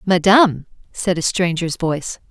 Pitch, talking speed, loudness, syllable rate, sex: 175 Hz, 130 wpm, -17 LUFS, 4.8 syllables/s, female